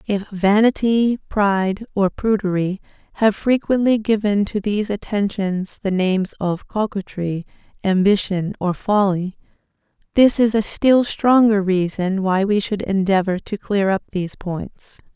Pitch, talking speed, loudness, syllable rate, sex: 200 Hz, 130 wpm, -19 LUFS, 4.2 syllables/s, female